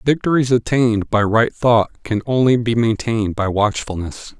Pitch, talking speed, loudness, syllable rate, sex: 115 Hz, 150 wpm, -17 LUFS, 4.9 syllables/s, male